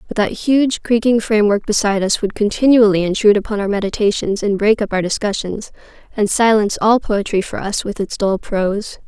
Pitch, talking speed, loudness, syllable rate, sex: 210 Hz, 185 wpm, -16 LUFS, 5.7 syllables/s, female